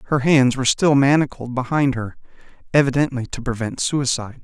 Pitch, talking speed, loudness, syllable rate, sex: 130 Hz, 150 wpm, -19 LUFS, 5.7 syllables/s, male